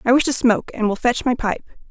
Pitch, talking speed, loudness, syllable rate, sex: 240 Hz, 285 wpm, -19 LUFS, 6.5 syllables/s, female